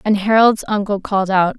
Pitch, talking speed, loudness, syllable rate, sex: 205 Hz, 190 wpm, -16 LUFS, 5.4 syllables/s, female